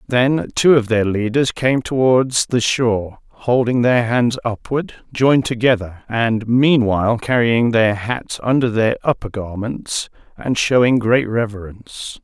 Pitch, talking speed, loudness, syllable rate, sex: 120 Hz, 135 wpm, -17 LUFS, 4.1 syllables/s, male